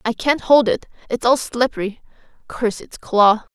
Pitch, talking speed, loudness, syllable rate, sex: 235 Hz, 170 wpm, -18 LUFS, 4.8 syllables/s, female